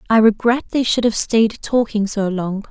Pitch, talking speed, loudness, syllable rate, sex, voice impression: 220 Hz, 200 wpm, -17 LUFS, 4.6 syllables/s, female, feminine, adult-like, relaxed, bright, soft, raspy, intellectual, calm, friendly, reassuring, elegant, kind, modest